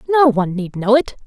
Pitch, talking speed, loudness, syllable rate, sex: 235 Hz, 235 wpm, -16 LUFS, 5.8 syllables/s, female